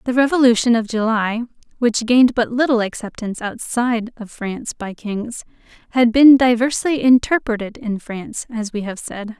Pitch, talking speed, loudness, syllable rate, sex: 230 Hz, 155 wpm, -18 LUFS, 5.2 syllables/s, female